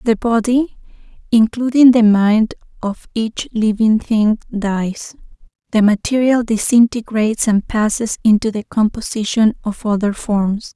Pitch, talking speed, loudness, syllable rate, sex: 220 Hz, 115 wpm, -16 LUFS, 4.2 syllables/s, female